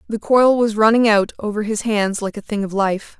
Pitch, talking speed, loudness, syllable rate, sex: 215 Hz, 245 wpm, -17 LUFS, 5.1 syllables/s, female